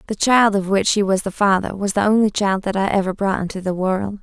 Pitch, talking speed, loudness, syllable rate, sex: 195 Hz, 270 wpm, -18 LUFS, 5.7 syllables/s, female